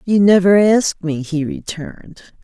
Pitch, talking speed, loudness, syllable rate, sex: 180 Hz, 150 wpm, -15 LUFS, 4.7 syllables/s, female